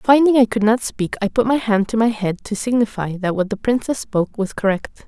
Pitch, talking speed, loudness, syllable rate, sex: 220 Hz, 250 wpm, -19 LUFS, 5.6 syllables/s, female